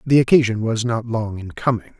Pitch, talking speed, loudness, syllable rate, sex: 115 Hz, 210 wpm, -19 LUFS, 5.4 syllables/s, male